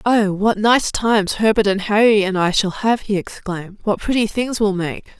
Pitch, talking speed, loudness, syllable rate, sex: 205 Hz, 210 wpm, -18 LUFS, 4.9 syllables/s, female